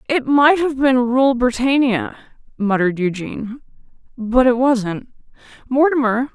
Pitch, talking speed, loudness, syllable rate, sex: 250 Hz, 115 wpm, -17 LUFS, 4.4 syllables/s, female